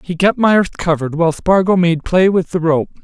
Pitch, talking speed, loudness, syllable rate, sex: 175 Hz, 215 wpm, -14 LUFS, 5.3 syllables/s, male